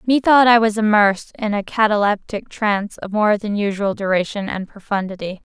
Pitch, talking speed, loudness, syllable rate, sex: 210 Hz, 165 wpm, -18 LUFS, 5.3 syllables/s, female